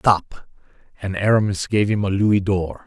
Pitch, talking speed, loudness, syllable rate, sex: 100 Hz, 170 wpm, -20 LUFS, 4.3 syllables/s, male